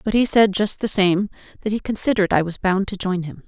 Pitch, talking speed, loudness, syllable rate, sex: 195 Hz, 240 wpm, -20 LUFS, 5.8 syllables/s, female